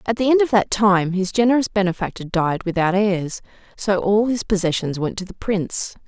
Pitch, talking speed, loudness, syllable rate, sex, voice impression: 195 Hz, 195 wpm, -20 LUFS, 5.3 syllables/s, female, feminine, adult-like, slightly middle-aged, thin, slightly tensed, slightly powerful, bright, hard, clear, fluent, slightly cute, cool, intellectual, refreshing, very sincere, slightly calm, friendly, reassuring, slightly unique, elegant, slightly wild, slightly sweet, lively, strict, slightly sharp